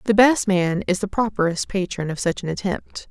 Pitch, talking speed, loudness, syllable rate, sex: 195 Hz, 210 wpm, -21 LUFS, 5.1 syllables/s, female